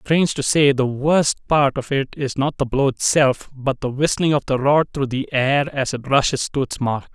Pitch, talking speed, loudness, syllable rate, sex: 140 Hz, 235 wpm, -19 LUFS, 4.7 syllables/s, male